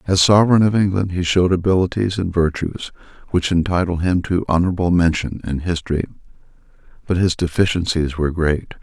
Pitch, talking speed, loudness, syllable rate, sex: 90 Hz, 150 wpm, -18 LUFS, 5.9 syllables/s, male